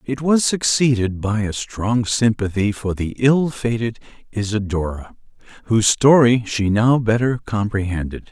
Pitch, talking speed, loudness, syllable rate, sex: 110 Hz, 130 wpm, -18 LUFS, 4.4 syllables/s, male